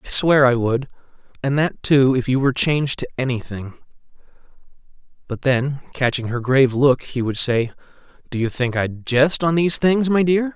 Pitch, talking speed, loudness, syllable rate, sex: 135 Hz, 180 wpm, -19 LUFS, 5.2 syllables/s, male